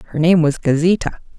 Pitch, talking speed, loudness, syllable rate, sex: 165 Hz, 175 wpm, -16 LUFS, 6.3 syllables/s, female